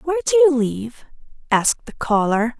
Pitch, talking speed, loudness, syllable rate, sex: 270 Hz, 160 wpm, -18 LUFS, 6.2 syllables/s, female